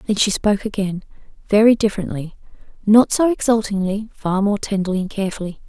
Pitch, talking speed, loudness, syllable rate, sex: 205 Hz, 125 wpm, -18 LUFS, 6.2 syllables/s, female